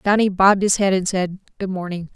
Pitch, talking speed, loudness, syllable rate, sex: 190 Hz, 225 wpm, -19 LUFS, 6.0 syllables/s, female